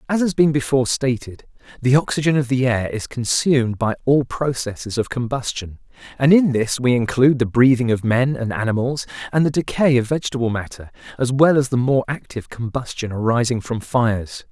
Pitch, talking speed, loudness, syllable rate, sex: 125 Hz, 180 wpm, -19 LUFS, 5.5 syllables/s, male